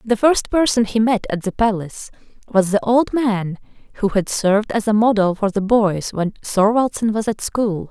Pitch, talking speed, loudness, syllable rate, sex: 215 Hz, 195 wpm, -18 LUFS, 4.8 syllables/s, female